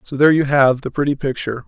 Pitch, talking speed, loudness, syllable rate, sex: 135 Hz, 250 wpm, -17 LUFS, 7.1 syllables/s, male